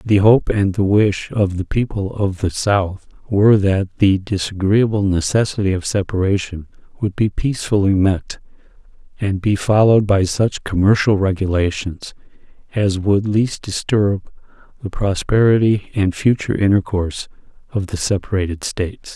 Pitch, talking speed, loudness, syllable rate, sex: 100 Hz, 130 wpm, -17 LUFS, 4.7 syllables/s, male